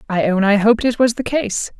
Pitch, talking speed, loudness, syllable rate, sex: 220 Hz, 265 wpm, -16 LUFS, 5.7 syllables/s, female